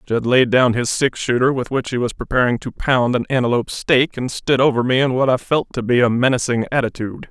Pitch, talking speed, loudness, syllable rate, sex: 125 Hz, 240 wpm, -18 LUFS, 5.8 syllables/s, male